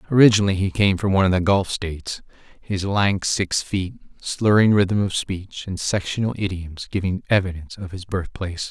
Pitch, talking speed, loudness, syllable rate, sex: 95 Hz, 170 wpm, -21 LUFS, 5.3 syllables/s, male